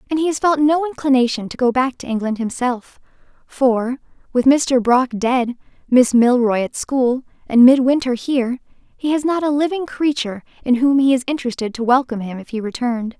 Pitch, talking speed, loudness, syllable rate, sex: 255 Hz, 185 wpm, -18 LUFS, 5.4 syllables/s, female